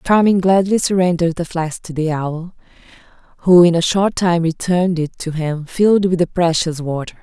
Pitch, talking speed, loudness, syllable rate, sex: 170 Hz, 185 wpm, -16 LUFS, 5.2 syllables/s, female